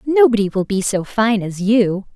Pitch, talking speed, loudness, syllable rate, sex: 215 Hz, 195 wpm, -17 LUFS, 4.6 syllables/s, female